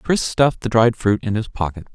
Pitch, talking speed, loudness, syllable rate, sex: 115 Hz, 245 wpm, -19 LUFS, 5.4 syllables/s, male